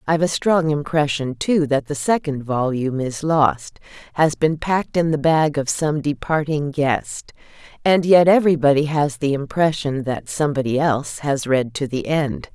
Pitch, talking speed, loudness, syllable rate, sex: 145 Hz, 165 wpm, -19 LUFS, 4.7 syllables/s, female